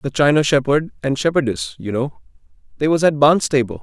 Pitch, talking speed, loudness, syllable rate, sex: 145 Hz, 170 wpm, -18 LUFS, 5.6 syllables/s, male